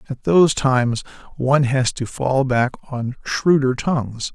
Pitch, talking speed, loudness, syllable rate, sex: 130 Hz, 150 wpm, -19 LUFS, 4.3 syllables/s, male